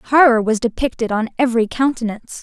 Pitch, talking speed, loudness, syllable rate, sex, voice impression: 240 Hz, 150 wpm, -17 LUFS, 6.1 syllables/s, female, very feminine, young, very thin, very tensed, very powerful, slightly bright, slightly hard, very clear, very fluent, slightly raspy, very cute, slightly intellectual, very refreshing, sincere, slightly calm, very friendly, reassuring, very unique, slightly elegant, wild, sweet, very lively, strict, intense, slightly sharp, very light